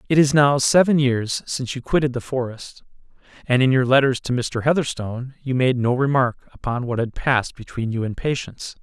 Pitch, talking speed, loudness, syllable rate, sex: 130 Hz, 195 wpm, -20 LUFS, 5.5 syllables/s, male